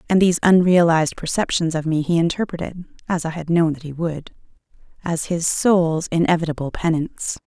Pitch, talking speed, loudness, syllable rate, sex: 165 Hz, 160 wpm, -20 LUFS, 5.6 syllables/s, female